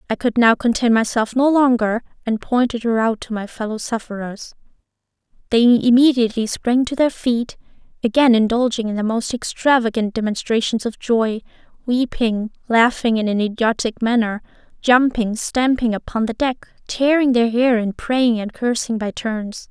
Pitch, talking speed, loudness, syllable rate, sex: 230 Hz, 150 wpm, -18 LUFS, 4.8 syllables/s, female